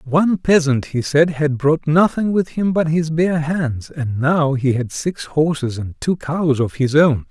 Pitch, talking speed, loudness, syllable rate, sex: 150 Hz, 205 wpm, -18 LUFS, 4.1 syllables/s, male